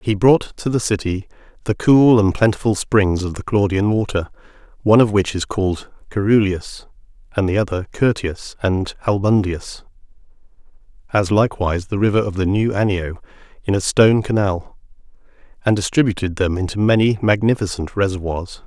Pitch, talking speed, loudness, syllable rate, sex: 100 Hz, 145 wpm, -18 LUFS, 5.3 syllables/s, male